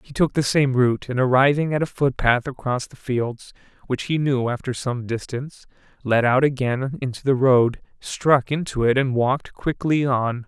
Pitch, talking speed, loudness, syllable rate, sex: 130 Hz, 185 wpm, -21 LUFS, 4.8 syllables/s, male